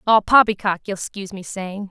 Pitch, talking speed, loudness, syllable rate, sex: 200 Hz, 190 wpm, -19 LUFS, 5.1 syllables/s, female